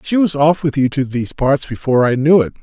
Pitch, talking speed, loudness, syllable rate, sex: 140 Hz, 275 wpm, -15 LUFS, 6.1 syllables/s, male